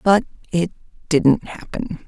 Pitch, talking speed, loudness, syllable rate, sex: 180 Hz, 115 wpm, -21 LUFS, 3.8 syllables/s, female